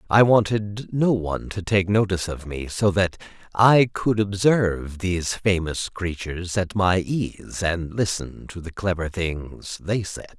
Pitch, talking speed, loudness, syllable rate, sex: 95 Hz, 160 wpm, -23 LUFS, 4.2 syllables/s, male